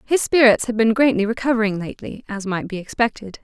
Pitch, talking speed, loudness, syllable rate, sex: 220 Hz, 190 wpm, -19 LUFS, 6.1 syllables/s, female